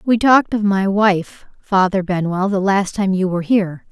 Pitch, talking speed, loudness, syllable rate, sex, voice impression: 195 Hz, 200 wpm, -16 LUFS, 4.9 syllables/s, female, feminine, adult-like, tensed, bright, clear, fluent, intellectual, friendly, elegant, lively, sharp